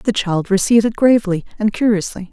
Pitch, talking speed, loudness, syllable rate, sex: 205 Hz, 180 wpm, -16 LUFS, 6.1 syllables/s, female